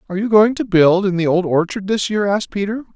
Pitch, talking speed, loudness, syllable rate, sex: 195 Hz, 265 wpm, -16 LUFS, 6.3 syllables/s, male